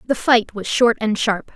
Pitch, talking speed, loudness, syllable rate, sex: 225 Hz, 230 wpm, -18 LUFS, 4.4 syllables/s, female